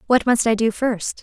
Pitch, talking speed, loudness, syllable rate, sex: 230 Hz, 245 wpm, -19 LUFS, 4.7 syllables/s, female